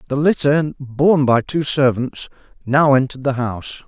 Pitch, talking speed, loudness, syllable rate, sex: 135 Hz, 155 wpm, -17 LUFS, 4.9 syllables/s, male